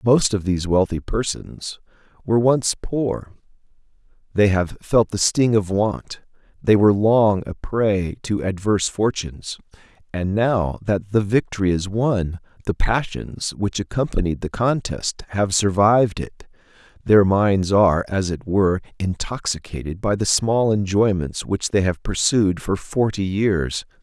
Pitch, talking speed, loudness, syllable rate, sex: 100 Hz, 140 wpm, -20 LUFS, 4.2 syllables/s, male